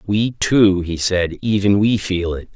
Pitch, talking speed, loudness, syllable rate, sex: 100 Hz, 190 wpm, -17 LUFS, 3.9 syllables/s, male